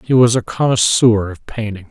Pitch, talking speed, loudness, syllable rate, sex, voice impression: 115 Hz, 190 wpm, -15 LUFS, 5.0 syllables/s, male, masculine, very adult-like, slightly thick, cool, slightly intellectual, slightly friendly